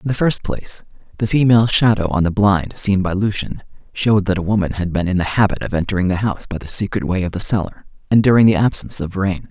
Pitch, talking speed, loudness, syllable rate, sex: 100 Hz, 245 wpm, -17 LUFS, 6.4 syllables/s, male